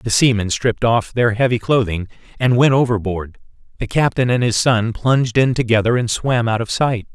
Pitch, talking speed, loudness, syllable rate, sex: 115 Hz, 195 wpm, -17 LUFS, 5.2 syllables/s, male